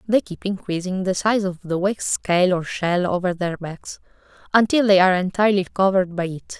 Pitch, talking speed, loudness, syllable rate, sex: 185 Hz, 190 wpm, -20 LUFS, 5.4 syllables/s, female